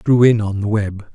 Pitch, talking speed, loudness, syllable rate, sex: 105 Hz, 315 wpm, -17 LUFS, 5.5 syllables/s, male